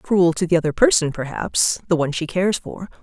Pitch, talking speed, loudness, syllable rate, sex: 175 Hz, 200 wpm, -19 LUFS, 5.8 syllables/s, female